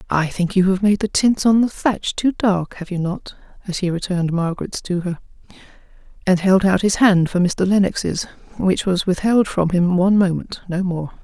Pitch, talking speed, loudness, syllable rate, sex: 185 Hz, 205 wpm, -18 LUFS, 5.0 syllables/s, female